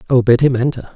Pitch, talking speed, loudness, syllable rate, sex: 125 Hz, 250 wpm, -14 LUFS, 6.7 syllables/s, male